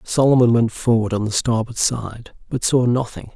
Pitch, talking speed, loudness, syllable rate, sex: 115 Hz, 180 wpm, -18 LUFS, 4.8 syllables/s, male